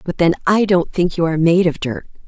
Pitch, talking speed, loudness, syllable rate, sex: 175 Hz, 265 wpm, -16 LUFS, 5.8 syllables/s, female